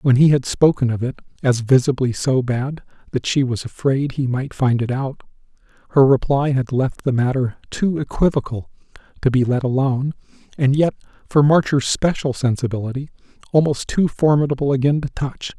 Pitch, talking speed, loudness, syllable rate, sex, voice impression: 135 Hz, 165 wpm, -19 LUFS, 5.2 syllables/s, male, very masculine, very adult-like, old, very thick, slightly relaxed, slightly weak, slightly bright, very soft, very muffled, slightly halting, raspy, cool, intellectual, sincere, very calm, very mature, very friendly, very reassuring, very unique, very elegant, wild, very sweet, very kind, very modest